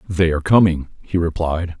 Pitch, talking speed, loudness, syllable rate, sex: 85 Hz, 165 wpm, -18 LUFS, 5.3 syllables/s, male